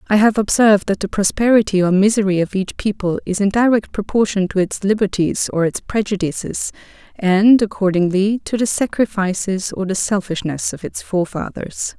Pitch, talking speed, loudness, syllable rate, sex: 200 Hz, 160 wpm, -17 LUFS, 5.3 syllables/s, female